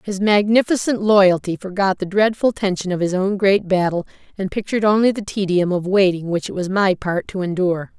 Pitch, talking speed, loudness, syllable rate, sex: 190 Hz, 195 wpm, -18 LUFS, 5.4 syllables/s, female